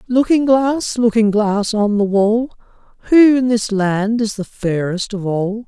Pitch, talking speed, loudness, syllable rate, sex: 220 Hz, 170 wpm, -16 LUFS, 3.8 syllables/s, male